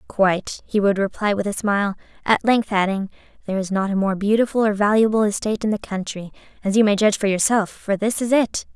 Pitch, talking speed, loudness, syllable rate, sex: 205 Hz, 220 wpm, -20 LUFS, 6.2 syllables/s, female